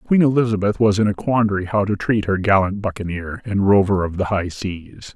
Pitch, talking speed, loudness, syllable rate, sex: 100 Hz, 210 wpm, -19 LUFS, 5.3 syllables/s, male